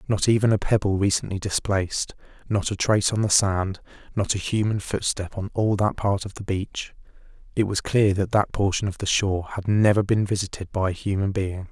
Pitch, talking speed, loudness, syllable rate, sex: 100 Hz, 205 wpm, -23 LUFS, 5.4 syllables/s, male